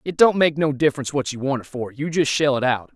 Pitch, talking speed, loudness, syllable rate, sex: 140 Hz, 305 wpm, -21 LUFS, 6.4 syllables/s, male